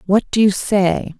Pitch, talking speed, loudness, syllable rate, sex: 195 Hz, 200 wpm, -16 LUFS, 3.9 syllables/s, female